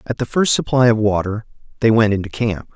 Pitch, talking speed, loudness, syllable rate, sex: 115 Hz, 220 wpm, -17 LUFS, 5.8 syllables/s, male